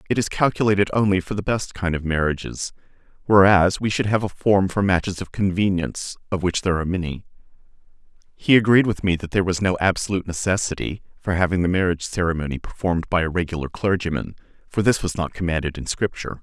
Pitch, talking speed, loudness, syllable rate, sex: 90 Hz, 190 wpm, -21 LUFS, 6.4 syllables/s, male